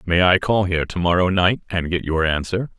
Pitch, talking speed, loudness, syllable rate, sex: 90 Hz, 235 wpm, -19 LUFS, 5.6 syllables/s, male